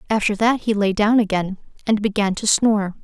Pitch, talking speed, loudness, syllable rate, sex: 210 Hz, 200 wpm, -19 LUFS, 5.6 syllables/s, female